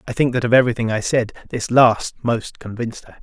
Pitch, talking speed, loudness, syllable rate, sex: 115 Hz, 225 wpm, -19 LUFS, 6.1 syllables/s, male